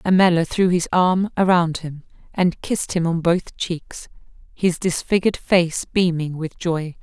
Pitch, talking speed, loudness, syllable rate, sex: 175 Hz, 155 wpm, -20 LUFS, 4.3 syllables/s, female